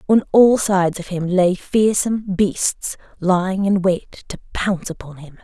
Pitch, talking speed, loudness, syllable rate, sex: 190 Hz, 165 wpm, -18 LUFS, 4.5 syllables/s, female